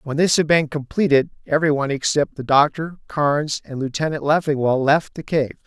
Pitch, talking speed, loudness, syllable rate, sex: 145 Hz, 170 wpm, -19 LUFS, 5.5 syllables/s, male